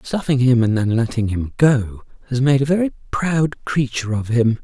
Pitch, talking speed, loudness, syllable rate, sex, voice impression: 125 Hz, 195 wpm, -18 LUFS, 4.9 syllables/s, male, masculine, adult-like, slightly dark, calm, slightly friendly, kind